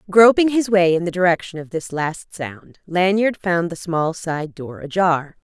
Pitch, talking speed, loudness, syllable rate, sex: 175 Hz, 185 wpm, -19 LUFS, 4.3 syllables/s, female